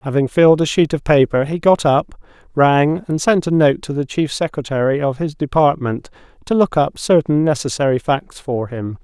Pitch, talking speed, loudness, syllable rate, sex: 145 Hz, 195 wpm, -16 LUFS, 5.0 syllables/s, male